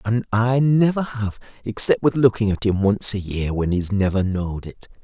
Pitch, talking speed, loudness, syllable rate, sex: 105 Hz, 215 wpm, -20 LUFS, 5.1 syllables/s, male